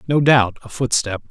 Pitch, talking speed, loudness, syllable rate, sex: 125 Hz, 185 wpm, -17 LUFS, 5.0 syllables/s, male